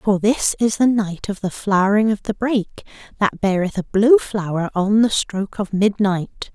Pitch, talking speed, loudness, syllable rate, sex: 205 Hz, 195 wpm, -19 LUFS, 4.8 syllables/s, female